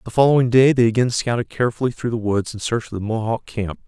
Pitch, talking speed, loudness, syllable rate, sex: 115 Hz, 250 wpm, -19 LUFS, 6.5 syllables/s, male